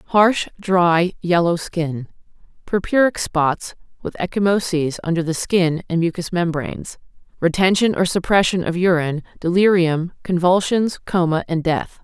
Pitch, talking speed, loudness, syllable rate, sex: 175 Hz, 120 wpm, -19 LUFS, 4.5 syllables/s, female